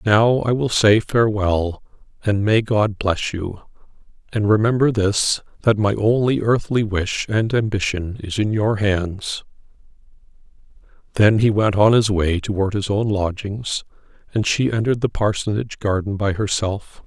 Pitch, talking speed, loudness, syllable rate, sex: 105 Hz, 145 wpm, -19 LUFS, 4.5 syllables/s, male